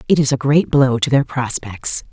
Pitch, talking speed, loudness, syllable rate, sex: 130 Hz, 225 wpm, -17 LUFS, 4.8 syllables/s, female